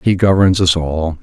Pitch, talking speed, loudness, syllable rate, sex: 90 Hz, 195 wpm, -13 LUFS, 4.5 syllables/s, male